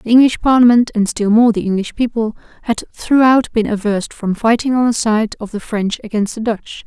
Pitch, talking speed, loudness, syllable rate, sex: 225 Hz, 210 wpm, -15 LUFS, 5.4 syllables/s, female